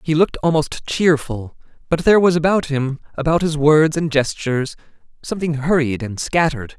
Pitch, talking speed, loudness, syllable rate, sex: 150 Hz, 160 wpm, -18 LUFS, 5.4 syllables/s, male